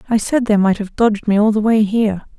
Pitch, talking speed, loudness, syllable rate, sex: 215 Hz, 275 wpm, -16 LUFS, 6.3 syllables/s, female